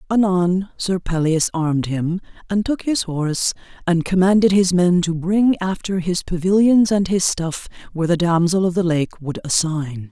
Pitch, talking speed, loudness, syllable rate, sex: 180 Hz, 170 wpm, -19 LUFS, 4.8 syllables/s, female